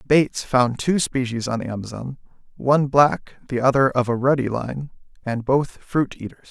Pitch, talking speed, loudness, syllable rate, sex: 130 Hz, 165 wpm, -21 LUFS, 4.9 syllables/s, male